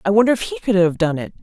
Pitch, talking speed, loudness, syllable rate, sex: 190 Hz, 335 wpm, -18 LUFS, 7.1 syllables/s, female